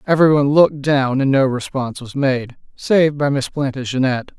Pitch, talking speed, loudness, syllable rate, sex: 135 Hz, 165 wpm, -17 LUFS, 5.3 syllables/s, male